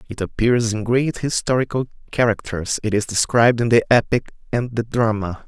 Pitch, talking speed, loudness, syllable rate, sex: 115 Hz, 165 wpm, -19 LUFS, 5.3 syllables/s, male